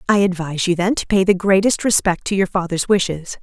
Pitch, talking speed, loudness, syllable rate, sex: 190 Hz, 230 wpm, -17 LUFS, 5.9 syllables/s, female